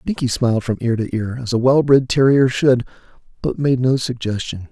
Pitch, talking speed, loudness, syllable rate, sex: 125 Hz, 205 wpm, -18 LUFS, 5.3 syllables/s, male